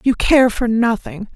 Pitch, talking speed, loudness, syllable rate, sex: 230 Hz, 180 wpm, -16 LUFS, 4.1 syllables/s, female